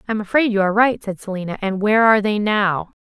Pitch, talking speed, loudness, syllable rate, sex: 205 Hz, 255 wpm, -18 LUFS, 6.9 syllables/s, female